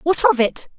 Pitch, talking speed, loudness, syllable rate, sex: 275 Hz, 230 wpm, -17 LUFS, 4.3 syllables/s, female